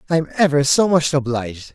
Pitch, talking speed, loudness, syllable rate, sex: 145 Hz, 170 wpm, -17 LUFS, 5.5 syllables/s, male